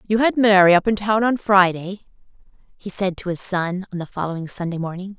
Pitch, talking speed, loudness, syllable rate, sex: 190 Hz, 210 wpm, -19 LUFS, 5.6 syllables/s, female